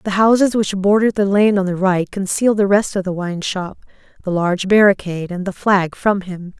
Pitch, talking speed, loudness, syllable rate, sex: 195 Hz, 220 wpm, -17 LUFS, 5.5 syllables/s, female